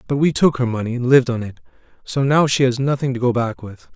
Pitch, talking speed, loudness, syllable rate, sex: 125 Hz, 275 wpm, -18 LUFS, 6.3 syllables/s, male